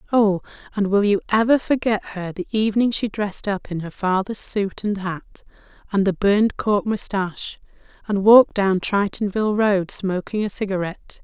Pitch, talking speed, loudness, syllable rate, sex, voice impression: 200 Hz, 165 wpm, -21 LUFS, 5.0 syllables/s, female, very feminine, adult-like, slightly middle-aged, very thin, slightly relaxed, slightly weak, slightly dark, slightly hard, clear, slightly fluent, slightly raspy, cool, very intellectual, slightly refreshing, very sincere, calm, friendly, very reassuring, slightly unique, elegant, slightly sweet, slightly lively, kind, slightly intense